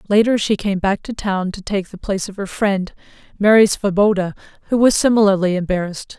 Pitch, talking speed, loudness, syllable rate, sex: 200 Hz, 185 wpm, -17 LUFS, 5.8 syllables/s, female